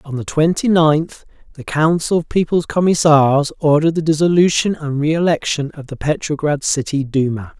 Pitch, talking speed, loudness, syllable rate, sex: 155 Hz, 150 wpm, -16 LUFS, 5.1 syllables/s, male